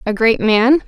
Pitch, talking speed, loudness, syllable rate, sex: 235 Hz, 205 wpm, -14 LUFS, 4.0 syllables/s, female